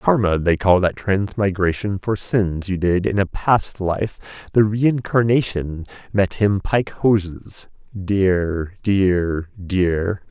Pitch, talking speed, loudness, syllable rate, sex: 95 Hz, 130 wpm, -19 LUFS, 3.1 syllables/s, male